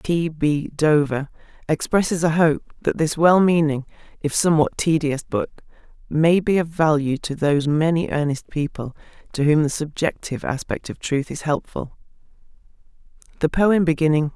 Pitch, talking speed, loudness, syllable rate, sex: 155 Hz, 145 wpm, -20 LUFS, 4.9 syllables/s, female